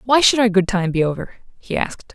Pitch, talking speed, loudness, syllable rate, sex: 205 Hz, 250 wpm, -18 LUFS, 6.1 syllables/s, female